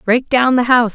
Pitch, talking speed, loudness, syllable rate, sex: 245 Hz, 255 wpm, -13 LUFS, 5.5 syllables/s, female